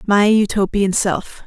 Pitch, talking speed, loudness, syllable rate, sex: 200 Hz, 125 wpm, -17 LUFS, 3.8 syllables/s, female